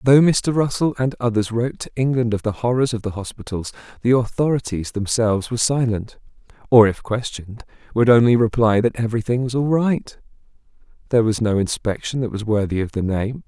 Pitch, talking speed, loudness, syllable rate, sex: 115 Hz, 180 wpm, -20 LUFS, 5.8 syllables/s, male